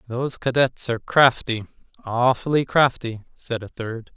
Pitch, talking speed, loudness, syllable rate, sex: 120 Hz, 130 wpm, -22 LUFS, 4.6 syllables/s, male